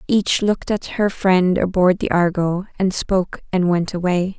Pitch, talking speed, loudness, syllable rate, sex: 185 Hz, 180 wpm, -19 LUFS, 4.5 syllables/s, female